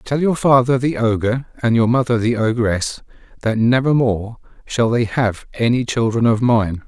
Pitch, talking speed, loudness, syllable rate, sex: 120 Hz, 175 wpm, -17 LUFS, 4.5 syllables/s, male